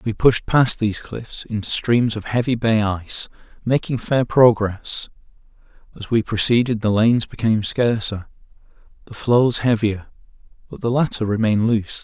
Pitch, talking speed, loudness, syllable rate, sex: 115 Hz, 145 wpm, -19 LUFS, 4.9 syllables/s, male